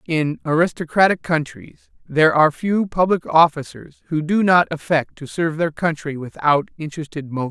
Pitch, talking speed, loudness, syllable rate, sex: 160 Hz, 150 wpm, -19 LUFS, 5.4 syllables/s, male